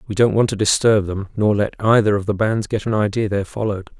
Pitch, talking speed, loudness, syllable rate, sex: 105 Hz, 270 wpm, -18 LUFS, 6.6 syllables/s, male